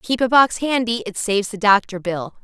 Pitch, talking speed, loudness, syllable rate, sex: 220 Hz, 220 wpm, -18 LUFS, 5.3 syllables/s, female